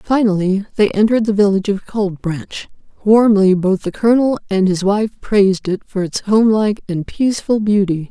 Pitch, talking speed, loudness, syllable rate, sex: 205 Hz, 170 wpm, -15 LUFS, 5.4 syllables/s, female